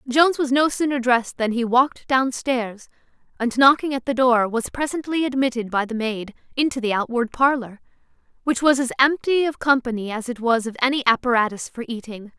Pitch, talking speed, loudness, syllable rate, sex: 250 Hz, 185 wpm, -21 LUFS, 5.6 syllables/s, female